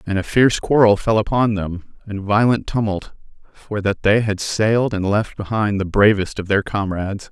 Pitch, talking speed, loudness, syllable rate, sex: 105 Hz, 190 wpm, -18 LUFS, 4.9 syllables/s, male